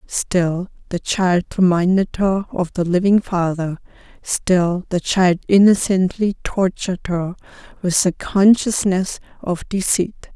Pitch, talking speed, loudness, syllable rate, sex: 185 Hz, 115 wpm, -18 LUFS, 3.9 syllables/s, female